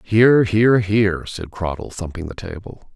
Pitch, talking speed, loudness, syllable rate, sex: 100 Hz, 160 wpm, -18 LUFS, 3.9 syllables/s, male